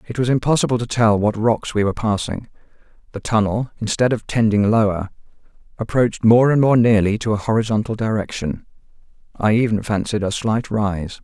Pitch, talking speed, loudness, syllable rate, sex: 110 Hz, 165 wpm, -18 LUFS, 5.6 syllables/s, male